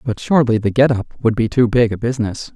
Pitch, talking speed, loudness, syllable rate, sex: 115 Hz, 260 wpm, -16 LUFS, 6.2 syllables/s, male